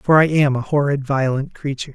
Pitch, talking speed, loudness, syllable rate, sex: 140 Hz, 215 wpm, -18 LUFS, 5.8 syllables/s, male